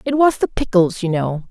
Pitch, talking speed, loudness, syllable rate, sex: 200 Hz, 240 wpm, -17 LUFS, 5.0 syllables/s, female